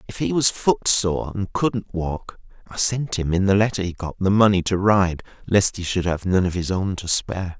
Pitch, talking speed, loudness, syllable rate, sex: 95 Hz, 230 wpm, -21 LUFS, 5.0 syllables/s, male